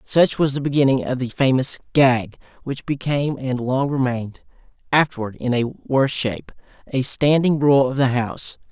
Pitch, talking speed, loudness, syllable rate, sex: 130 Hz, 150 wpm, -20 LUFS, 5.1 syllables/s, male